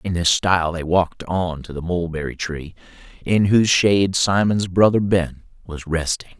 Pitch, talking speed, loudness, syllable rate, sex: 90 Hz, 170 wpm, -19 LUFS, 4.9 syllables/s, male